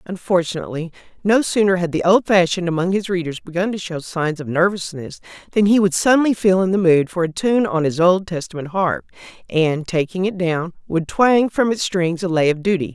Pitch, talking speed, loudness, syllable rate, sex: 180 Hz, 205 wpm, -18 LUFS, 5.5 syllables/s, female